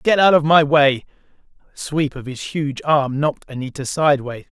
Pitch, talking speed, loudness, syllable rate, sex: 145 Hz, 185 wpm, -18 LUFS, 5.4 syllables/s, male